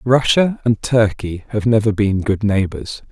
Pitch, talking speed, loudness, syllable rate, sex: 110 Hz, 155 wpm, -17 LUFS, 4.2 syllables/s, male